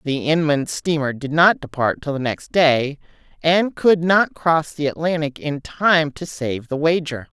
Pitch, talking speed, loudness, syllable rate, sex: 155 Hz, 180 wpm, -19 LUFS, 4.2 syllables/s, female